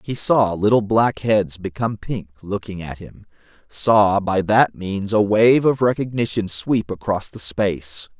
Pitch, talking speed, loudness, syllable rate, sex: 105 Hz, 160 wpm, -19 LUFS, 4.1 syllables/s, male